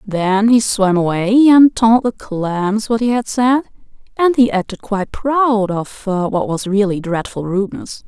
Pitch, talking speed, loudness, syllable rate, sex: 210 Hz, 170 wpm, -15 LUFS, 4.0 syllables/s, female